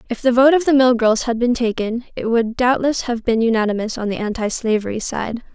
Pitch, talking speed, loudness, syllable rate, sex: 235 Hz, 215 wpm, -18 LUFS, 5.6 syllables/s, female